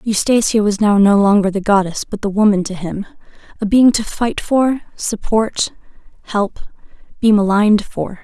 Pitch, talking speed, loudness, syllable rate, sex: 210 Hz, 160 wpm, -15 LUFS, 4.8 syllables/s, female